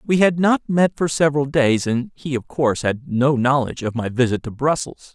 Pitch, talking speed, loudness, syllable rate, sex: 140 Hz, 220 wpm, -19 LUFS, 5.3 syllables/s, male